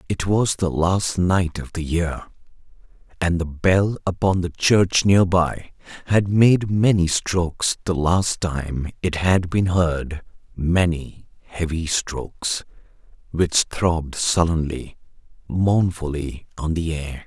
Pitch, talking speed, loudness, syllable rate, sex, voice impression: 85 Hz, 130 wpm, -21 LUFS, 3.5 syllables/s, male, masculine, middle-aged, thick, tensed, powerful, hard, raspy, intellectual, slightly mature, wild, slightly strict